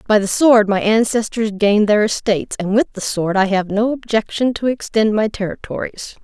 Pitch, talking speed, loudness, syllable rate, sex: 215 Hz, 190 wpm, -17 LUFS, 5.3 syllables/s, female